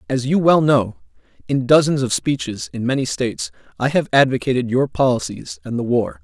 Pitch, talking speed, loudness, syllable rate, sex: 135 Hz, 185 wpm, -18 LUFS, 5.4 syllables/s, male